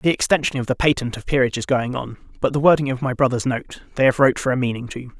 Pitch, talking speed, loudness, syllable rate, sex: 130 Hz, 275 wpm, -20 LUFS, 6.9 syllables/s, male